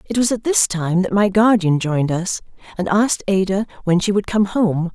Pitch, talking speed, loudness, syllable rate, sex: 195 Hz, 220 wpm, -18 LUFS, 5.2 syllables/s, female